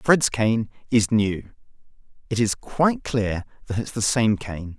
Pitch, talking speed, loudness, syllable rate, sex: 110 Hz, 165 wpm, -23 LUFS, 4.1 syllables/s, male